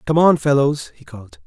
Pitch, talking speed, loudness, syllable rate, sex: 135 Hz, 205 wpm, -16 LUFS, 5.4 syllables/s, male